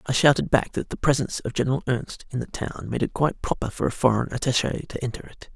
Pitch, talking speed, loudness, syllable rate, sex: 130 Hz, 250 wpm, -25 LUFS, 6.5 syllables/s, male